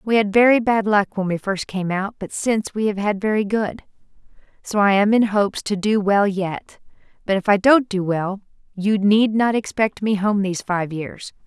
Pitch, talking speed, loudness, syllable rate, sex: 205 Hz, 220 wpm, -19 LUFS, 4.9 syllables/s, female